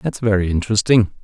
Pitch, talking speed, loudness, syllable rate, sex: 105 Hz, 145 wpm, -17 LUFS, 6.4 syllables/s, male